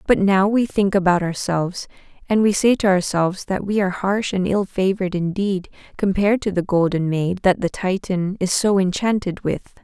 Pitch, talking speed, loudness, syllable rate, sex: 190 Hz, 190 wpm, -20 LUFS, 5.2 syllables/s, female